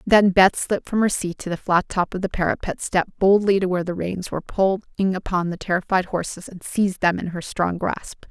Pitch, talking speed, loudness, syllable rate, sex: 185 Hz, 230 wpm, -21 LUFS, 5.6 syllables/s, female